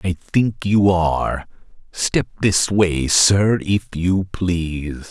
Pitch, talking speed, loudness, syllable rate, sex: 90 Hz, 130 wpm, -18 LUFS, 3.8 syllables/s, male